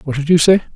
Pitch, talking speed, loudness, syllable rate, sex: 160 Hz, 315 wpm, -13 LUFS, 8.0 syllables/s, male